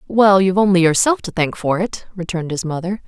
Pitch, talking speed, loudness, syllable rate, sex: 185 Hz, 215 wpm, -17 LUFS, 6.0 syllables/s, female